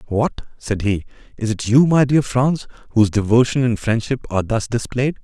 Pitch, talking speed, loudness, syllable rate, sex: 120 Hz, 185 wpm, -18 LUFS, 5.2 syllables/s, male